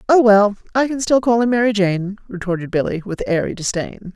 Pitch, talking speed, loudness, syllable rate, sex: 210 Hz, 200 wpm, -18 LUFS, 5.5 syllables/s, female